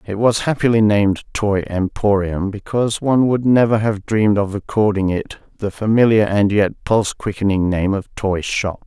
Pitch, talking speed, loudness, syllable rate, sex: 105 Hz, 160 wpm, -17 LUFS, 5.0 syllables/s, male